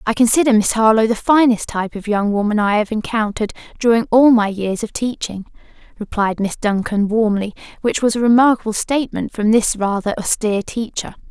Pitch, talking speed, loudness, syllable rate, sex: 220 Hz, 175 wpm, -17 LUFS, 5.7 syllables/s, female